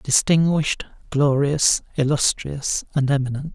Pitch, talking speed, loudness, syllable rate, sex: 145 Hz, 85 wpm, -20 LUFS, 4.3 syllables/s, male